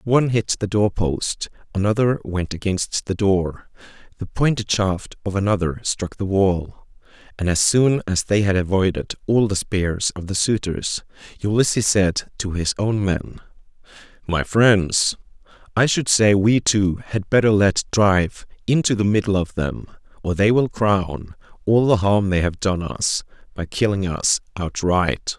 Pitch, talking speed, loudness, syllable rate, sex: 100 Hz, 160 wpm, -20 LUFS, 4.2 syllables/s, male